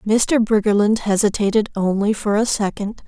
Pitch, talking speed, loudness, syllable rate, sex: 210 Hz, 135 wpm, -18 LUFS, 4.9 syllables/s, female